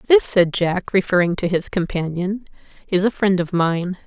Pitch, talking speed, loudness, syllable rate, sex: 185 Hz, 175 wpm, -19 LUFS, 4.7 syllables/s, female